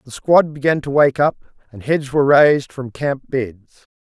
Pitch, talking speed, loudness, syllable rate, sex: 135 Hz, 195 wpm, -16 LUFS, 4.5 syllables/s, male